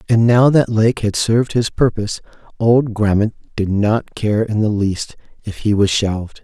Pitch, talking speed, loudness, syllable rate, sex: 110 Hz, 185 wpm, -16 LUFS, 4.6 syllables/s, male